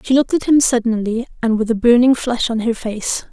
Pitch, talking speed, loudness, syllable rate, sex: 235 Hz, 235 wpm, -16 LUFS, 5.6 syllables/s, female